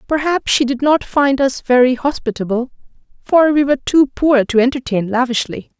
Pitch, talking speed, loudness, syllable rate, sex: 260 Hz, 165 wpm, -15 LUFS, 5.1 syllables/s, female